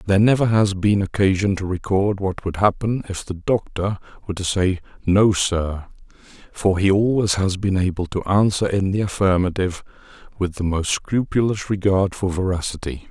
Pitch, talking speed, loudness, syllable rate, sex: 95 Hz, 165 wpm, -20 LUFS, 5.1 syllables/s, male